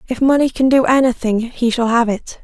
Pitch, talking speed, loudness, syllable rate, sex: 245 Hz, 220 wpm, -15 LUFS, 5.2 syllables/s, female